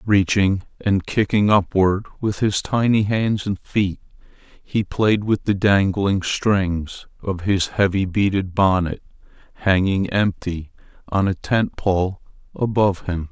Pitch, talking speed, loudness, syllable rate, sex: 95 Hz, 130 wpm, -20 LUFS, 3.8 syllables/s, male